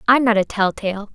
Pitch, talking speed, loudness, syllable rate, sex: 215 Hz, 265 wpm, -18 LUFS, 5.1 syllables/s, female